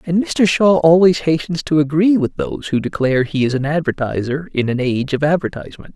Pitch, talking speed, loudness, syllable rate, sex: 155 Hz, 200 wpm, -16 LUFS, 5.8 syllables/s, male